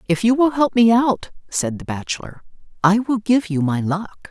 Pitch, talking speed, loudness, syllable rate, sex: 205 Hz, 210 wpm, -19 LUFS, 4.8 syllables/s, female